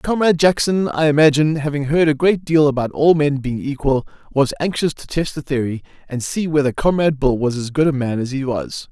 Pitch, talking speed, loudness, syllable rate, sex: 145 Hz, 220 wpm, -18 LUFS, 5.7 syllables/s, male